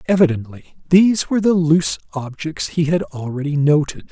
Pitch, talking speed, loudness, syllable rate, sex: 155 Hz, 145 wpm, -17 LUFS, 5.4 syllables/s, male